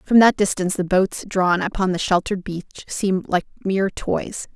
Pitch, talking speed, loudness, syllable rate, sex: 190 Hz, 185 wpm, -21 LUFS, 5.3 syllables/s, female